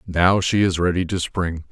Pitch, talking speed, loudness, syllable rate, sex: 90 Hz, 210 wpm, -20 LUFS, 4.6 syllables/s, male